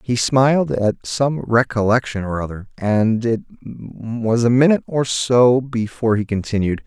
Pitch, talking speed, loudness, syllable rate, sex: 120 Hz, 150 wpm, -18 LUFS, 4.4 syllables/s, male